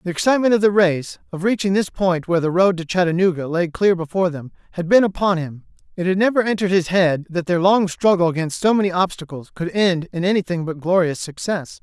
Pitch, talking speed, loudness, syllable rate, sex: 180 Hz, 220 wpm, -19 LUFS, 6.0 syllables/s, male